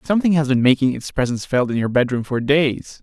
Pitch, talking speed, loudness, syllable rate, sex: 135 Hz, 260 wpm, -18 LUFS, 6.1 syllables/s, male